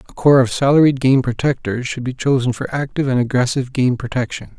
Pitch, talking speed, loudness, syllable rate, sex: 125 Hz, 195 wpm, -17 LUFS, 6.2 syllables/s, male